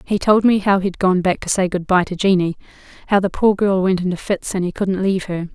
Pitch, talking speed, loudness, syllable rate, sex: 190 Hz, 260 wpm, -18 LUFS, 5.7 syllables/s, female